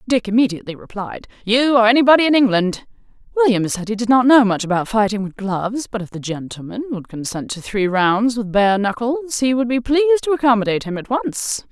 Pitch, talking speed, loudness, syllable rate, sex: 225 Hz, 205 wpm, -17 LUFS, 5.7 syllables/s, female